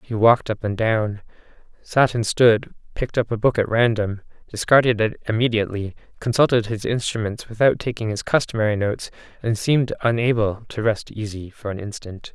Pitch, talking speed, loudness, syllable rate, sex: 110 Hz, 165 wpm, -21 LUFS, 5.6 syllables/s, male